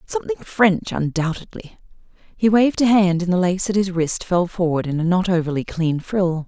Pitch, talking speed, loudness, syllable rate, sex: 180 Hz, 195 wpm, -19 LUFS, 5.2 syllables/s, female